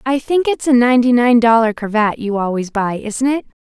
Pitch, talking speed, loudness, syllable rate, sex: 235 Hz, 215 wpm, -15 LUFS, 5.3 syllables/s, female